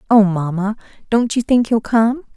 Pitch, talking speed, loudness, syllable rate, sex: 220 Hz, 180 wpm, -17 LUFS, 4.7 syllables/s, female